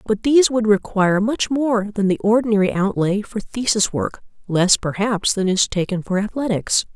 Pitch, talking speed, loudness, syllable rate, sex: 210 Hz, 175 wpm, -19 LUFS, 5.0 syllables/s, female